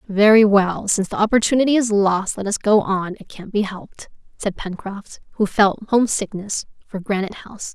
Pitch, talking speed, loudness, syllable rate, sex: 205 Hz, 185 wpm, -19 LUFS, 5.2 syllables/s, female